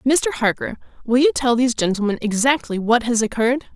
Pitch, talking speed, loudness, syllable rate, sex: 240 Hz, 175 wpm, -19 LUFS, 5.8 syllables/s, female